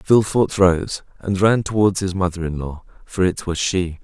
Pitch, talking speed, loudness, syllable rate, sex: 95 Hz, 195 wpm, -19 LUFS, 4.8 syllables/s, male